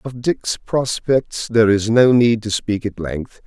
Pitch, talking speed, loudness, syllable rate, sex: 110 Hz, 190 wpm, -17 LUFS, 3.9 syllables/s, male